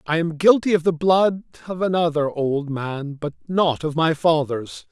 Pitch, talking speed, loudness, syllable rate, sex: 160 Hz, 185 wpm, -20 LUFS, 4.3 syllables/s, male